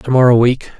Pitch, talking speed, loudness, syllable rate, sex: 125 Hz, 225 wpm, -12 LUFS, 5.6 syllables/s, male